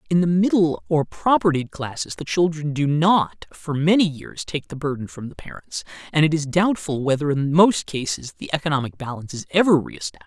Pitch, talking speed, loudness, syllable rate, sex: 155 Hz, 195 wpm, -21 LUFS, 5.6 syllables/s, male